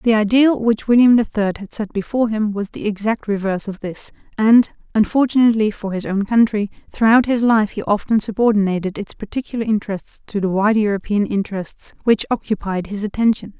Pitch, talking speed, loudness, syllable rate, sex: 215 Hz, 175 wpm, -18 LUFS, 5.8 syllables/s, female